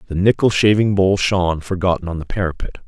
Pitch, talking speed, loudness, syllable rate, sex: 95 Hz, 165 wpm, -17 LUFS, 6.2 syllables/s, male